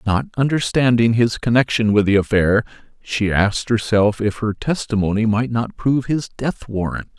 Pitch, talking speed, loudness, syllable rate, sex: 115 Hz, 160 wpm, -18 LUFS, 5.0 syllables/s, male